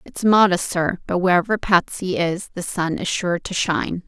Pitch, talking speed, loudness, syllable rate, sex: 180 Hz, 190 wpm, -20 LUFS, 4.7 syllables/s, female